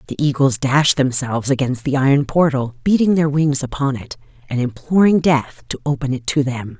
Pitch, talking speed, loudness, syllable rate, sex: 140 Hz, 185 wpm, -17 LUFS, 5.3 syllables/s, female